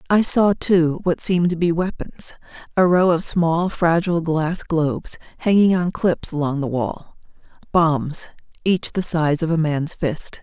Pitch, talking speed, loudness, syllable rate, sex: 165 Hz, 160 wpm, -20 LUFS, 4.2 syllables/s, female